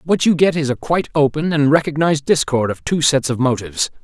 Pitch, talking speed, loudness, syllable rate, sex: 145 Hz, 225 wpm, -17 LUFS, 6.1 syllables/s, male